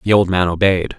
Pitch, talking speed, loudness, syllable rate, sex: 95 Hz, 245 wpm, -15 LUFS, 5.7 syllables/s, male